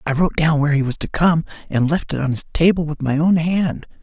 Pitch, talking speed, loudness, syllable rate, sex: 155 Hz, 270 wpm, -18 LUFS, 6.0 syllables/s, male